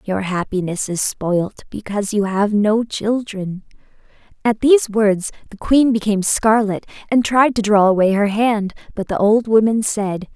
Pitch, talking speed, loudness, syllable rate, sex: 210 Hz, 160 wpm, -17 LUFS, 4.5 syllables/s, female